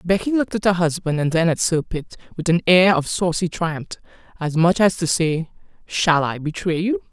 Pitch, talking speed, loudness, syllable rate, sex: 170 Hz, 200 wpm, -19 LUFS, 5.2 syllables/s, female